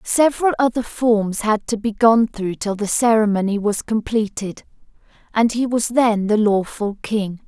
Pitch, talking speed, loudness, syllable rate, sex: 220 Hz, 160 wpm, -19 LUFS, 4.4 syllables/s, female